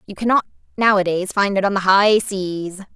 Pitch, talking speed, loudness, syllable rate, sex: 195 Hz, 185 wpm, -18 LUFS, 5.1 syllables/s, female